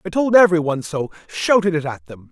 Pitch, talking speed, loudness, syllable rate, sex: 165 Hz, 235 wpm, -18 LUFS, 6.3 syllables/s, male